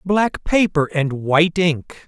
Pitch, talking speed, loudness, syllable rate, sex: 165 Hz, 145 wpm, -18 LUFS, 3.6 syllables/s, male